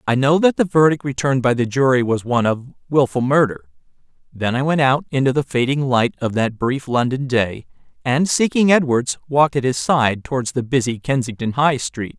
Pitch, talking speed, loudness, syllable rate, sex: 130 Hz, 195 wpm, -18 LUFS, 5.3 syllables/s, male